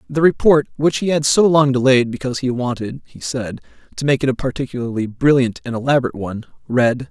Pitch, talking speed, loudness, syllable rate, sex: 130 Hz, 195 wpm, -17 LUFS, 6.4 syllables/s, male